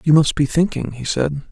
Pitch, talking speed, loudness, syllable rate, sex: 145 Hz, 235 wpm, -19 LUFS, 5.3 syllables/s, male